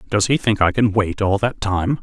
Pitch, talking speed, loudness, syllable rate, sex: 105 Hz, 265 wpm, -18 LUFS, 4.9 syllables/s, male